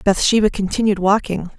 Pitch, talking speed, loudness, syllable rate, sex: 200 Hz, 115 wpm, -17 LUFS, 5.5 syllables/s, female